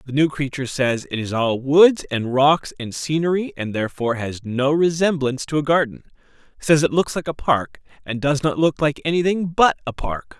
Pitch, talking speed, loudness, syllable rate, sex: 145 Hz, 200 wpm, -20 LUFS, 5.2 syllables/s, male